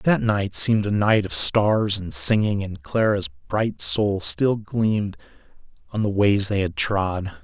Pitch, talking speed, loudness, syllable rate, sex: 100 Hz, 180 wpm, -21 LUFS, 4.0 syllables/s, male